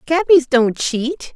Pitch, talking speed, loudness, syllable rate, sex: 280 Hz, 135 wpm, -16 LUFS, 3.3 syllables/s, female